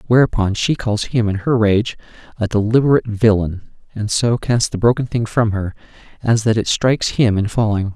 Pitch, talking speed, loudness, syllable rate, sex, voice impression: 110 Hz, 190 wpm, -17 LUFS, 5.2 syllables/s, male, masculine, adult-like, slightly weak, refreshing, slightly sincere, calm, slightly modest